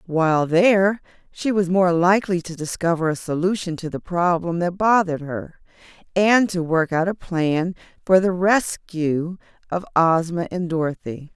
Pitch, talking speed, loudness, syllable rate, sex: 175 Hz, 155 wpm, -20 LUFS, 4.6 syllables/s, female